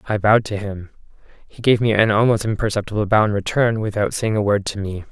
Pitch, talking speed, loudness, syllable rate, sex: 105 Hz, 225 wpm, -19 LUFS, 6.2 syllables/s, male